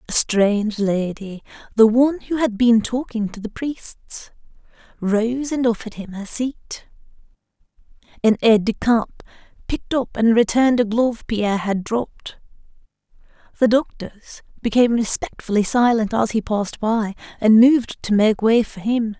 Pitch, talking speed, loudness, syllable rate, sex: 225 Hz, 145 wpm, -19 LUFS, 4.8 syllables/s, female